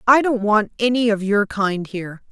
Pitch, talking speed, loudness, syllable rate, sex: 215 Hz, 210 wpm, -19 LUFS, 4.8 syllables/s, female